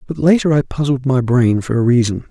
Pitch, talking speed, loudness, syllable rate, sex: 130 Hz, 235 wpm, -15 LUFS, 5.6 syllables/s, male